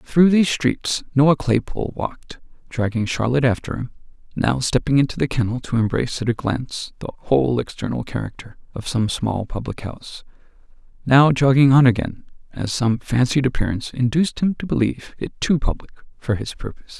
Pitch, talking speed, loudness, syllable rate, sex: 125 Hz, 165 wpm, -20 LUFS, 5.6 syllables/s, male